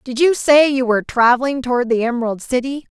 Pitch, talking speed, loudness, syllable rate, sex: 255 Hz, 205 wpm, -16 LUFS, 6.1 syllables/s, female